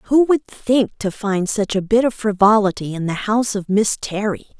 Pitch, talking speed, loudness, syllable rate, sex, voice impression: 210 Hz, 210 wpm, -18 LUFS, 4.7 syllables/s, female, very feminine, adult-like, slightly middle-aged, thin, tensed, slightly powerful, bright, very hard, very clear, fluent, slightly cool, intellectual, very refreshing, sincere, slightly calm, slightly friendly, reassuring, very unique, slightly elegant, wild, sweet, lively, strict, intense, slightly sharp